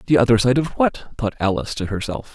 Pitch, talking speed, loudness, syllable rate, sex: 120 Hz, 230 wpm, -20 LUFS, 6.2 syllables/s, male